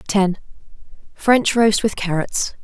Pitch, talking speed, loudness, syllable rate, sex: 200 Hz, 90 wpm, -18 LUFS, 3.5 syllables/s, female